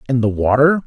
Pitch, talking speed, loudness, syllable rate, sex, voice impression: 130 Hz, 205 wpm, -15 LUFS, 6.0 syllables/s, male, masculine, adult-like, slightly muffled, refreshing, slightly sincere, friendly, kind